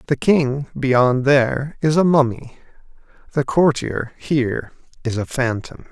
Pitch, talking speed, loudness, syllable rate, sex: 130 Hz, 130 wpm, -19 LUFS, 4.0 syllables/s, male